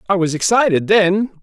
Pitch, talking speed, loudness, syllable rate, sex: 190 Hz, 170 wpm, -15 LUFS, 5.3 syllables/s, male